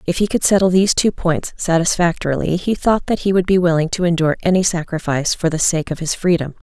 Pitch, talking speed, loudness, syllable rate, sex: 175 Hz, 225 wpm, -17 LUFS, 6.3 syllables/s, female